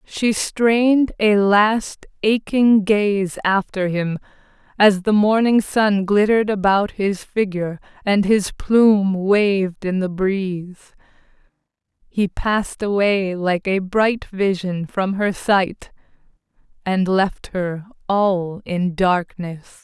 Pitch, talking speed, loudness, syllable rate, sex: 200 Hz, 120 wpm, -18 LUFS, 3.4 syllables/s, female